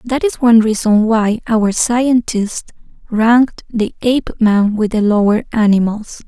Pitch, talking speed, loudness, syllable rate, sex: 220 Hz, 135 wpm, -14 LUFS, 4.2 syllables/s, female